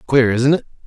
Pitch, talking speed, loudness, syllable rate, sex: 130 Hz, 210 wpm, -16 LUFS, 5.6 syllables/s, male